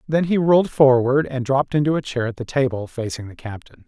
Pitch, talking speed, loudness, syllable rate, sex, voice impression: 130 Hz, 230 wpm, -19 LUFS, 5.9 syllables/s, male, masculine, middle-aged, slightly muffled, sincere, friendly